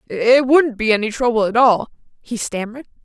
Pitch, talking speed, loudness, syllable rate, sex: 235 Hz, 180 wpm, -16 LUFS, 5.6 syllables/s, female